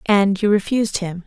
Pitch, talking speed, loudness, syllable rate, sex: 200 Hz, 190 wpm, -18 LUFS, 5.1 syllables/s, female